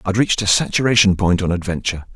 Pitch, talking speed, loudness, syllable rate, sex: 95 Hz, 195 wpm, -17 LUFS, 7.0 syllables/s, male